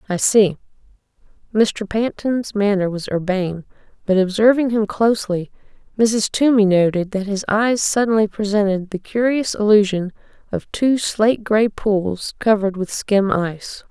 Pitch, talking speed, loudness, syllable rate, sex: 205 Hz, 135 wpm, -18 LUFS, 4.6 syllables/s, female